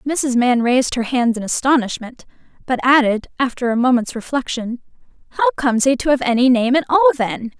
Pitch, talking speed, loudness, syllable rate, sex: 245 Hz, 180 wpm, -17 LUFS, 5.8 syllables/s, female